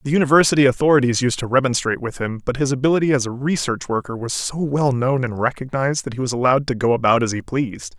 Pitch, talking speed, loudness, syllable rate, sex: 130 Hz, 235 wpm, -19 LUFS, 6.8 syllables/s, male